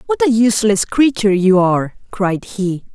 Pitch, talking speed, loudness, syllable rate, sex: 210 Hz, 165 wpm, -15 LUFS, 5.1 syllables/s, female